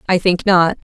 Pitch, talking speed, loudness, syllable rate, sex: 180 Hz, 200 wpm, -15 LUFS, 4.7 syllables/s, female